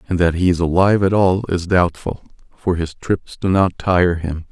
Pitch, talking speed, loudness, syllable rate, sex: 90 Hz, 215 wpm, -17 LUFS, 4.8 syllables/s, male